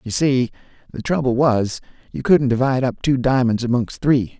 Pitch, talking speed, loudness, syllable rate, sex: 130 Hz, 175 wpm, -19 LUFS, 5.1 syllables/s, male